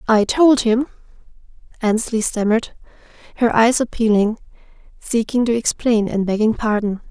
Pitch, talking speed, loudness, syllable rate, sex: 225 Hz, 120 wpm, -18 LUFS, 5.1 syllables/s, female